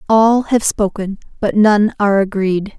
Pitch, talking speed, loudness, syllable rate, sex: 205 Hz, 150 wpm, -15 LUFS, 4.3 syllables/s, female